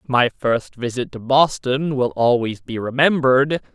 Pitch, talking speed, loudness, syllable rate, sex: 130 Hz, 145 wpm, -19 LUFS, 4.3 syllables/s, male